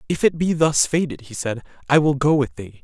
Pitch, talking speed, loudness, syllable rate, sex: 145 Hz, 255 wpm, -20 LUFS, 5.5 syllables/s, male